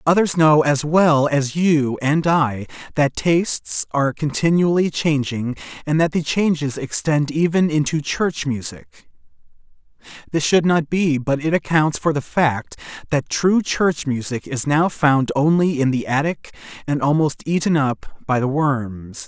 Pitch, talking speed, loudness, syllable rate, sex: 150 Hz, 155 wpm, -19 LUFS, 4.1 syllables/s, male